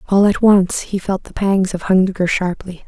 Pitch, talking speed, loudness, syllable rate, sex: 190 Hz, 210 wpm, -16 LUFS, 4.5 syllables/s, female